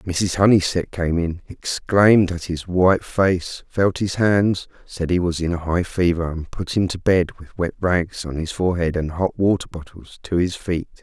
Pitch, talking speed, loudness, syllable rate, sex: 90 Hz, 200 wpm, -20 LUFS, 4.6 syllables/s, male